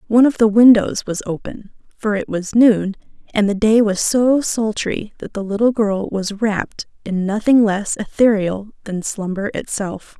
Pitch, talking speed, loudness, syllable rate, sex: 210 Hz, 170 wpm, -17 LUFS, 4.4 syllables/s, female